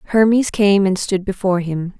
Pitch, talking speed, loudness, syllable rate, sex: 195 Hz, 180 wpm, -17 LUFS, 5.3 syllables/s, female